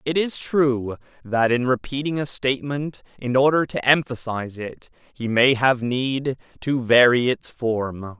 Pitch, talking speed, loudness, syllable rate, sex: 130 Hz, 155 wpm, -21 LUFS, 4.2 syllables/s, male